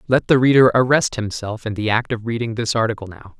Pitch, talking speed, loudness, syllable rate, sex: 115 Hz, 230 wpm, -18 LUFS, 5.9 syllables/s, male